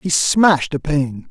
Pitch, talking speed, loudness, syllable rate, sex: 155 Hz, 185 wpm, -16 LUFS, 4.0 syllables/s, male